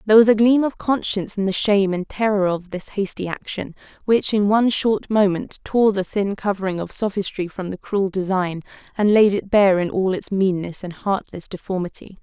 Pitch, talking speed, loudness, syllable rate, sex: 200 Hz, 200 wpm, -20 LUFS, 5.3 syllables/s, female